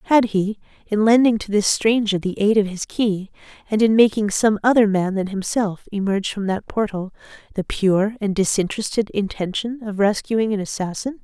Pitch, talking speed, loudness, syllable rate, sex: 210 Hz, 175 wpm, -20 LUFS, 5.1 syllables/s, female